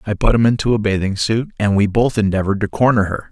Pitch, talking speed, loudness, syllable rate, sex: 105 Hz, 255 wpm, -17 LUFS, 6.5 syllables/s, male